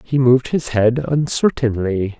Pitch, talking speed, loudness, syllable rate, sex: 125 Hz, 135 wpm, -17 LUFS, 4.4 syllables/s, male